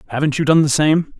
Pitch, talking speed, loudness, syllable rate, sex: 150 Hz, 250 wpm, -16 LUFS, 6.5 syllables/s, male